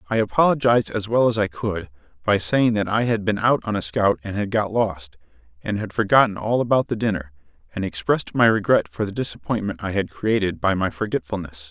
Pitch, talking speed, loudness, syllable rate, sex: 100 Hz, 210 wpm, -21 LUFS, 5.7 syllables/s, male